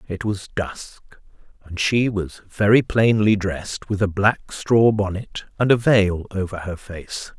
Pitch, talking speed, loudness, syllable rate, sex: 100 Hz, 165 wpm, -20 LUFS, 3.9 syllables/s, male